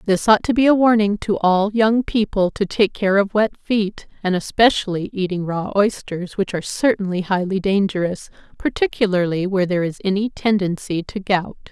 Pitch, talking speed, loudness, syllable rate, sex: 200 Hz, 175 wpm, -19 LUFS, 5.1 syllables/s, female